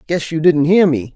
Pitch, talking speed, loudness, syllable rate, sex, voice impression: 155 Hz, 260 wpm, -14 LUFS, 5.1 syllables/s, male, very masculine, old, thick, relaxed, slightly powerful, slightly dark, slightly soft, clear, fluent, slightly cool, intellectual, slightly refreshing, sincere, calm, slightly friendly, slightly reassuring, unique, slightly elegant, wild, slightly sweet, lively, slightly strict, slightly intense